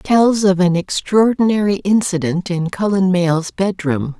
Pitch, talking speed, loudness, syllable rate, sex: 190 Hz, 130 wpm, -16 LUFS, 4.3 syllables/s, female